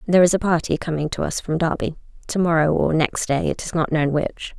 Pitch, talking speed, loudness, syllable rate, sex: 160 Hz, 235 wpm, -21 LUFS, 5.8 syllables/s, female